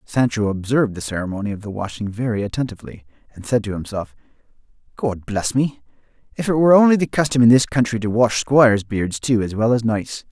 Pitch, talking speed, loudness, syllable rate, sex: 115 Hz, 200 wpm, -19 LUFS, 6.1 syllables/s, male